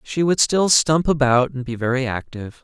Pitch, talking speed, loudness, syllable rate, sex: 135 Hz, 205 wpm, -18 LUFS, 5.1 syllables/s, male